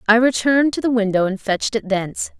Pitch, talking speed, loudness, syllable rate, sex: 220 Hz, 225 wpm, -18 LUFS, 6.6 syllables/s, female